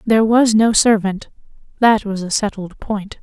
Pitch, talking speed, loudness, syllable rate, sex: 210 Hz, 150 wpm, -16 LUFS, 4.6 syllables/s, female